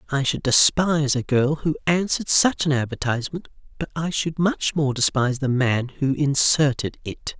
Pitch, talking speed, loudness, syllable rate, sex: 145 Hz, 170 wpm, -21 LUFS, 5.0 syllables/s, male